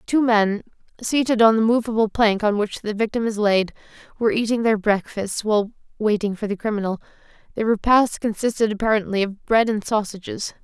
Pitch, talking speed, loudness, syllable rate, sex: 215 Hz, 170 wpm, -21 LUFS, 5.6 syllables/s, female